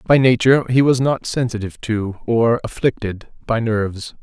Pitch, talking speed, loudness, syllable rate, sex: 115 Hz, 155 wpm, -18 LUFS, 5.1 syllables/s, male